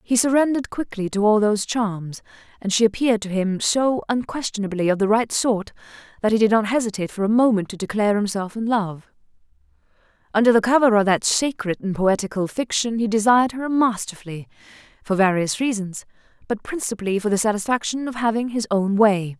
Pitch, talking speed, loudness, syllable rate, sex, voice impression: 215 Hz, 175 wpm, -21 LUFS, 5.9 syllables/s, female, feminine, adult-like, relaxed, powerful, clear, fluent, intellectual, calm, elegant, lively, sharp